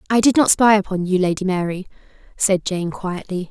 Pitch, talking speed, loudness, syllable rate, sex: 190 Hz, 190 wpm, -18 LUFS, 5.3 syllables/s, female